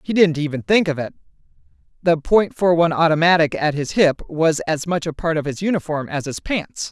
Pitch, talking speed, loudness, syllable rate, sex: 160 Hz, 215 wpm, -19 LUFS, 5.5 syllables/s, female